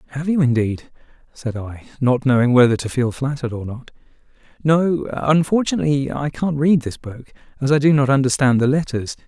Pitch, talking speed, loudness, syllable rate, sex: 135 Hz, 175 wpm, -18 LUFS, 5.5 syllables/s, male